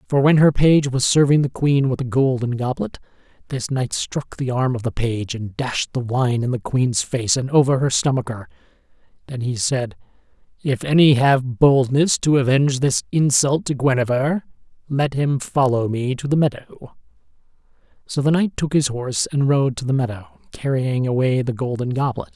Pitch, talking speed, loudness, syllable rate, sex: 130 Hz, 185 wpm, -19 LUFS, 4.8 syllables/s, male